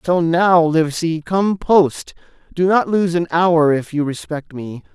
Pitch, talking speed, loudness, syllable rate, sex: 165 Hz, 170 wpm, -16 LUFS, 3.9 syllables/s, male